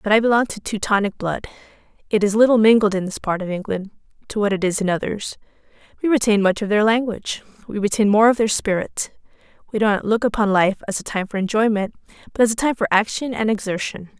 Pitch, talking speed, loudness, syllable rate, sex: 210 Hz, 220 wpm, -20 LUFS, 6.2 syllables/s, female